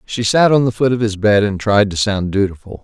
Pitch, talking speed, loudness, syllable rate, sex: 110 Hz, 275 wpm, -15 LUFS, 5.5 syllables/s, male